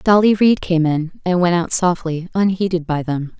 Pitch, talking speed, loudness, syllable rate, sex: 175 Hz, 195 wpm, -17 LUFS, 4.7 syllables/s, female